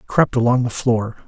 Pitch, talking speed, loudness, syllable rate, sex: 120 Hz, 235 wpm, -18 LUFS, 5.4 syllables/s, male